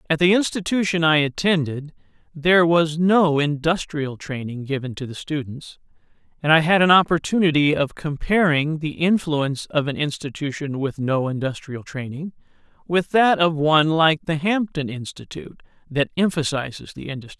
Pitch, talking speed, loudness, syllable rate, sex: 155 Hz, 145 wpm, -20 LUFS, 5.1 syllables/s, male